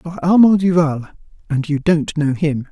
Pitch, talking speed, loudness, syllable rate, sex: 160 Hz, 155 wpm, -16 LUFS, 4.0 syllables/s, male